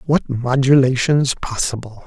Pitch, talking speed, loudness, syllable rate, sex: 130 Hz, 85 wpm, -17 LUFS, 4.2 syllables/s, male